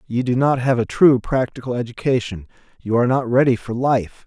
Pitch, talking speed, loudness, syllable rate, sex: 125 Hz, 185 wpm, -19 LUFS, 5.5 syllables/s, male